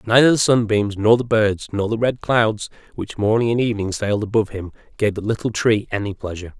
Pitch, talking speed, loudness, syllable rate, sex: 110 Hz, 210 wpm, -19 LUFS, 5.9 syllables/s, male